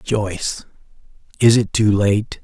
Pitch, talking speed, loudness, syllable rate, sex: 105 Hz, 125 wpm, -17 LUFS, 3.8 syllables/s, male